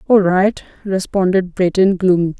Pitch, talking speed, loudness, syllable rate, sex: 185 Hz, 125 wpm, -15 LUFS, 4.9 syllables/s, female